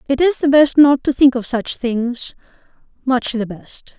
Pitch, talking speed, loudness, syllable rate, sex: 260 Hz, 180 wpm, -16 LUFS, 4.2 syllables/s, female